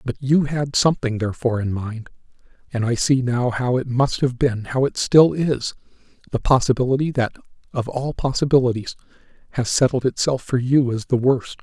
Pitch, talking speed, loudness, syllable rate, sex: 130 Hz, 175 wpm, -20 LUFS, 5.3 syllables/s, male